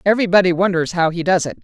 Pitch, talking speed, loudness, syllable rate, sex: 180 Hz, 220 wpm, -16 LUFS, 7.3 syllables/s, female